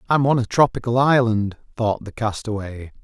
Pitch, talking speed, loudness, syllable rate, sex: 115 Hz, 160 wpm, -20 LUFS, 5.0 syllables/s, male